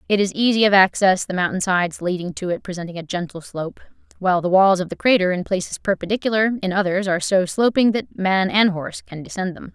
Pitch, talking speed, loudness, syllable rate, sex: 190 Hz, 220 wpm, -20 LUFS, 6.3 syllables/s, female